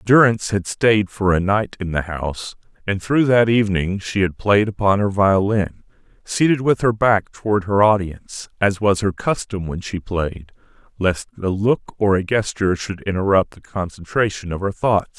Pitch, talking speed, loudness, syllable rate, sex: 100 Hz, 180 wpm, -19 LUFS, 4.8 syllables/s, male